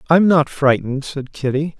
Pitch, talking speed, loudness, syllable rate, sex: 145 Hz, 165 wpm, -17 LUFS, 5.1 syllables/s, male